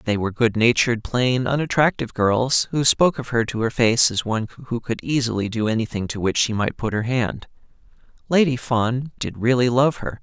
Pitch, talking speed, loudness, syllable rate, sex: 120 Hz, 195 wpm, -20 LUFS, 5.3 syllables/s, male